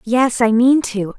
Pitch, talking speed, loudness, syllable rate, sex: 235 Hz, 200 wpm, -15 LUFS, 3.7 syllables/s, female